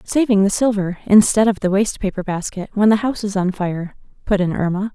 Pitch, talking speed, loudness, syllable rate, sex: 200 Hz, 220 wpm, -18 LUFS, 5.8 syllables/s, female